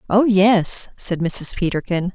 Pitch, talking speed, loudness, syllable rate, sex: 190 Hz, 140 wpm, -18 LUFS, 3.7 syllables/s, female